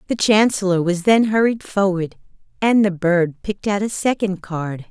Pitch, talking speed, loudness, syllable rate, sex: 195 Hz, 170 wpm, -18 LUFS, 4.8 syllables/s, female